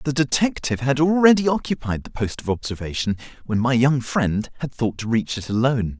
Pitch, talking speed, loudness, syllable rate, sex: 125 Hz, 190 wpm, -21 LUFS, 5.7 syllables/s, male